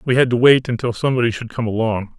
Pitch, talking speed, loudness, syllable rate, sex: 120 Hz, 245 wpm, -17 LUFS, 6.8 syllables/s, male